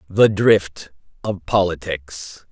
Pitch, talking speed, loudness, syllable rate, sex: 105 Hz, 95 wpm, -18 LUFS, 3.0 syllables/s, male